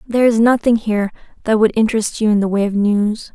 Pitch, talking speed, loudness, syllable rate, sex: 215 Hz, 235 wpm, -16 LUFS, 6.3 syllables/s, female